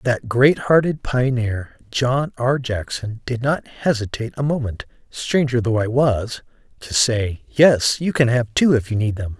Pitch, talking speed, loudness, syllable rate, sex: 120 Hz, 170 wpm, -19 LUFS, 4.2 syllables/s, male